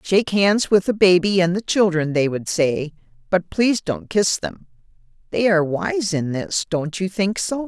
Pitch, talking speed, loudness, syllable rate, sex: 185 Hz, 190 wpm, -19 LUFS, 4.6 syllables/s, female